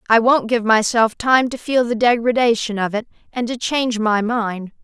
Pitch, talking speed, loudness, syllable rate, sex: 230 Hz, 200 wpm, -18 LUFS, 4.9 syllables/s, female